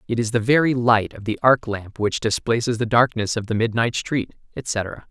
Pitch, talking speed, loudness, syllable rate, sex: 115 Hz, 210 wpm, -21 LUFS, 4.8 syllables/s, male